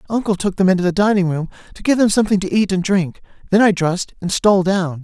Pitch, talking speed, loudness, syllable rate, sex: 190 Hz, 250 wpm, -17 LUFS, 6.6 syllables/s, male